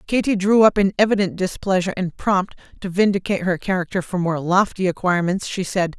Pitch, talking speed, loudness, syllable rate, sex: 190 Hz, 180 wpm, -20 LUFS, 5.9 syllables/s, female